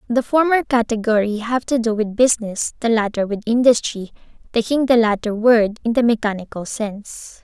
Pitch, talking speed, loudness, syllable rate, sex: 225 Hz, 160 wpm, -18 LUFS, 5.3 syllables/s, female